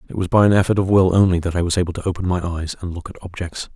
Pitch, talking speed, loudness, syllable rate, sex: 90 Hz, 320 wpm, -19 LUFS, 7.2 syllables/s, male